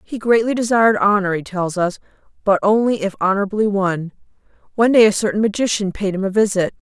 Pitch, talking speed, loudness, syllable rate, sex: 205 Hz, 185 wpm, -17 LUFS, 6.2 syllables/s, female